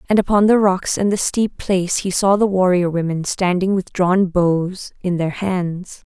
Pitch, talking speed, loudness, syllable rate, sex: 185 Hz, 195 wpm, -18 LUFS, 4.3 syllables/s, female